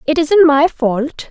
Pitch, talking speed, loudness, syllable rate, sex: 295 Hz, 185 wpm, -13 LUFS, 3.4 syllables/s, female